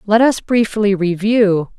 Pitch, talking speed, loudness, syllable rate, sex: 205 Hz, 135 wpm, -15 LUFS, 3.8 syllables/s, female